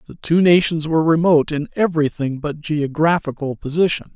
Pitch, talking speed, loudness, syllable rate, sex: 155 Hz, 145 wpm, -18 LUFS, 5.7 syllables/s, male